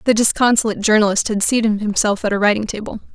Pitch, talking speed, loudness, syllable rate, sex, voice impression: 215 Hz, 190 wpm, -16 LUFS, 6.9 syllables/s, female, feminine, slightly young, tensed, fluent, intellectual, friendly, unique, slightly sharp